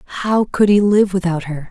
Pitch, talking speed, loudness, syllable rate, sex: 190 Hz, 210 wpm, -16 LUFS, 5.7 syllables/s, female